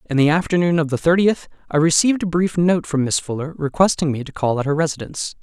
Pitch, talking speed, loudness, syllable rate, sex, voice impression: 160 Hz, 230 wpm, -19 LUFS, 6.4 syllables/s, male, very masculine, adult-like, slightly middle-aged, slightly thick, tensed, slightly weak, slightly bright, slightly soft, clear, fluent, slightly raspy, cool, intellectual, very refreshing, very sincere, slightly calm, slightly mature, friendly, reassuring, unique, elegant, slightly sweet, lively, very kind, slightly modest, slightly light